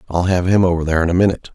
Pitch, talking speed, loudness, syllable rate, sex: 90 Hz, 310 wpm, -16 LUFS, 8.9 syllables/s, male